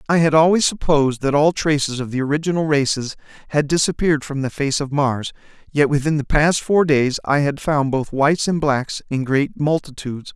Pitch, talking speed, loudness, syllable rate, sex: 145 Hz, 195 wpm, -19 LUFS, 5.4 syllables/s, male